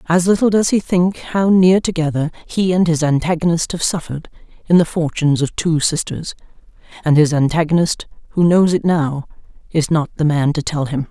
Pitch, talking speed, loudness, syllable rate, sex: 165 Hz, 185 wpm, -16 LUFS, 5.3 syllables/s, female